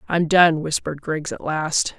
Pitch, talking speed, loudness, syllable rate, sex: 160 Hz, 180 wpm, -20 LUFS, 4.4 syllables/s, female